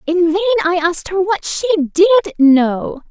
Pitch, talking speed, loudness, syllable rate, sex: 355 Hz, 175 wpm, -14 LUFS, 4.8 syllables/s, female